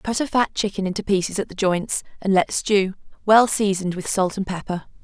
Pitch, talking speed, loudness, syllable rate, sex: 195 Hz, 215 wpm, -21 LUFS, 5.5 syllables/s, female